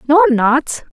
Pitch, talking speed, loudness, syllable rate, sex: 290 Hz, 190 wpm, -13 LUFS, 4.5 syllables/s, female